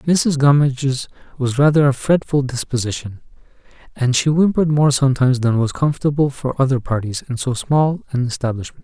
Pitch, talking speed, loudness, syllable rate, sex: 135 Hz, 155 wpm, -18 LUFS, 5.6 syllables/s, male